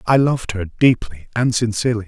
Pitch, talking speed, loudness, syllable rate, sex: 115 Hz, 175 wpm, -18 LUFS, 5.9 syllables/s, male